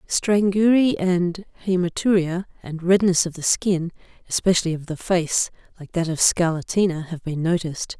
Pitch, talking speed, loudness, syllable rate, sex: 175 Hz, 145 wpm, -21 LUFS, 4.9 syllables/s, female